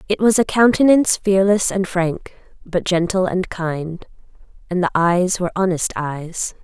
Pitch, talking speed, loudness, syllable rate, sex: 180 Hz, 155 wpm, -18 LUFS, 4.5 syllables/s, female